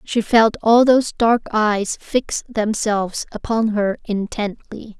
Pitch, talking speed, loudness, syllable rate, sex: 220 Hz, 130 wpm, -18 LUFS, 3.8 syllables/s, female